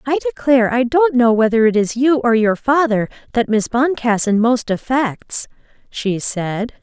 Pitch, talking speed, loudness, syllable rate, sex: 235 Hz, 165 wpm, -16 LUFS, 4.5 syllables/s, female